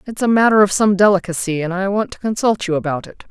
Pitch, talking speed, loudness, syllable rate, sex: 195 Hz, 255 wpm, -16 LUFS, 6.4 syllables/s, female